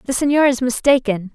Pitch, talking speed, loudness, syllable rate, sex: 255 Hz, 180 wpm, -16 LUFS, 5.8 syllables/s, female